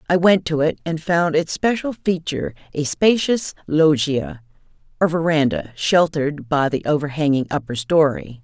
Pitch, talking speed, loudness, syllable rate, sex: 155 Hz, 140 wpm, -19 LUFS, 4.7 syllables/s, female